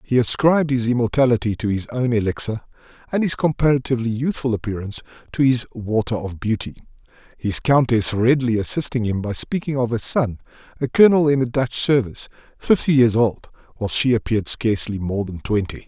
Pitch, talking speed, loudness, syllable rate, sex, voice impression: 120 Hz, 165 wpm, -20 LUFS, 6.0 syllables/s, male, masculine, adult-like, slightly powerful, slightly bright, slightly fluent, cool, calm, slightly mature, friendly, unique, wild, lively